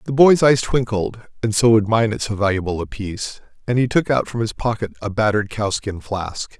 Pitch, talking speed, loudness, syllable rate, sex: 110 Hz, 220 wpm, -19 LUFS, 5.4 syllables/s, male